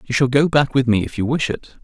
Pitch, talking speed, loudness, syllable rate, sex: 130 Hz, 325 wpm, -18 LUFS, 6.0 syllables/s, male